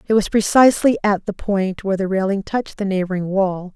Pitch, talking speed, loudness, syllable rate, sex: 200 Hz, 210 wpm, -18 LUFS, 5.9 syllables/s, female